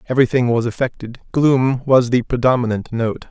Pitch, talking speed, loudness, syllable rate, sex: 125 Hz, 145 wpm, -17 LUFS, 5.2 syllables/s, male